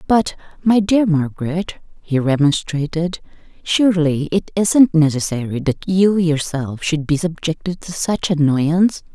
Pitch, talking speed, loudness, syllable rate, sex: 165 Hz, 125 wpm, -17 LUFS, 4.3 syllables/s, female